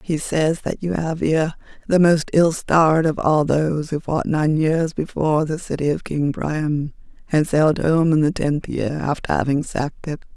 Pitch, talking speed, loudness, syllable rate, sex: 155 Hz, 195 wpm, -20 LUFS, 4.7 syllables/s, female